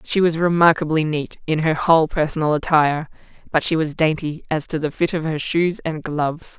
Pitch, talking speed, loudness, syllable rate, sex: 155 Hz, 200 wpm, -20 LUFS, 5.4 syllables/s, female